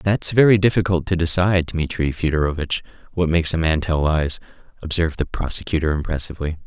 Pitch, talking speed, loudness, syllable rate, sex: 85 Hz, 155 wpm, -20 LUFS, 6.2 syllables/s, male